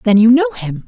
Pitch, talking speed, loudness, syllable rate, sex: 235 Hz, 275 wpm, -12 LUFS, 5.3 syllables/s, female